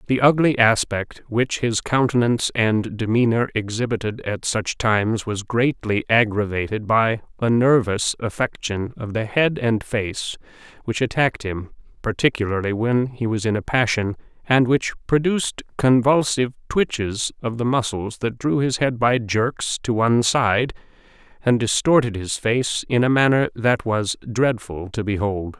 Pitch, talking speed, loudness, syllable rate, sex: 115 Hz, 150 wpm, -21 LUFS, 4.5 syllables/s, male